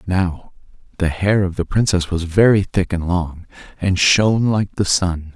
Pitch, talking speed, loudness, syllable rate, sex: 95 Hz, 180 wpm, -17 LUFS, 4.3 syllables/s, male